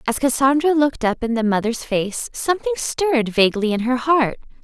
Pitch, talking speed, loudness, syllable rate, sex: 255 Hz, 180 wpm, -19 LUFS, 5.6 syllables/s, female